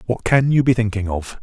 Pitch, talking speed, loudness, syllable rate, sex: 115 Hz, 250 wpm, -18 LUFS, 5.4 syllables/s, male